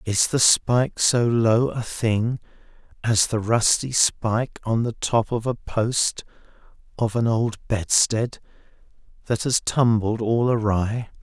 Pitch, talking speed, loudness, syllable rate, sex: 115 Hz, 140 wpm, -21 LUFS, 3.7 syllables/s, male